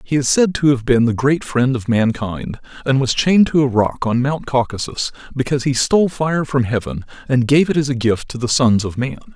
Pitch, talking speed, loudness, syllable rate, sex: 130 Hz, 235 wpm, -17 LUFS, 5.4 syllables/s, male